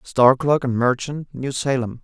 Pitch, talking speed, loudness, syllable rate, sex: 130 Hz, 175 wpm, -20 LUFS, 4.8 syllables/s, male